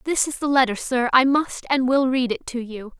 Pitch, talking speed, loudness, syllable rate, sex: 255 Hz, 260 wpm, -20 LUFS, 5.1 syllables/s, female